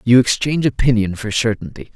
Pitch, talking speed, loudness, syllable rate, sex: 120 Hz, 155 wpm, -17 LUFS, 6.0 syllables/s, male